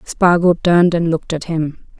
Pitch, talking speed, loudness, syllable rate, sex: 165 Hz, 180 wpm, -16 LUFS, 5.0 syllables/s, female